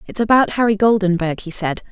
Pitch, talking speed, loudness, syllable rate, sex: 200 Hz, 190 wpm, -17 LUFS, 5.9 syllables/s, female